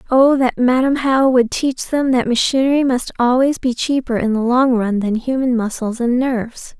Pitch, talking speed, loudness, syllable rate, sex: 250 Hz, 195 wpm, -16 LUFS, 4.8 syllables/s, female